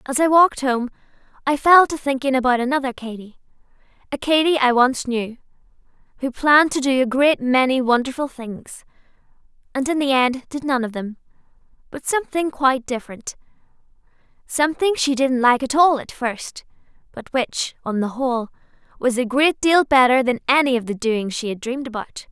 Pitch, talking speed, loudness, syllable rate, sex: 260 Hz, 165 wpm, -19 LUFS, 5.4 syllables/s, female